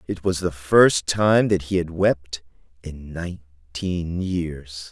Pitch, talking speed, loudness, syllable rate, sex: 85 Hz, 145 wpm, -21 LUFS, 3.4 syllables/s, male